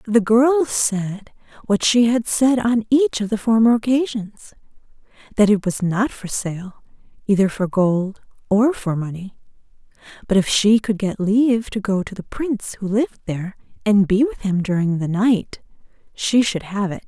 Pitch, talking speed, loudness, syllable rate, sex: 215 Hz, 170 wpm, -19 LUFS, 4.6 syllables/s, female